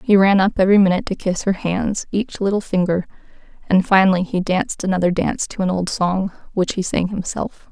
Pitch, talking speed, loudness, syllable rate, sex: 190 Hz, 200 wpm, -19 LUFS, 5.7 syllables/s, female